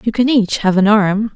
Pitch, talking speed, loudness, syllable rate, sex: 210 Hz, 265 wpm, -14 LUFS, 4.8 syllables/s, female